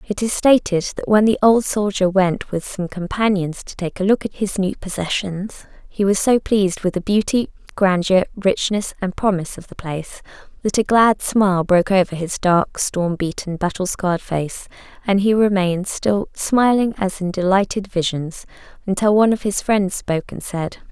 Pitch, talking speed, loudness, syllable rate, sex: 195 Hz, 185 wpm, -19 LUFS, 4.9 syllables/s, female